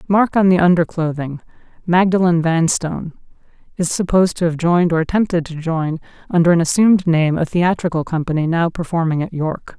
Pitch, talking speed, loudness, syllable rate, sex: 170 Hz, 160 wpm, -17 LUFS, 5.7 syllables/s, female